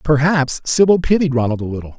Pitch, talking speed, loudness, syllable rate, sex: 140 Hz, 180 wpm, -16 LUFS, 5.9 syllables/s, male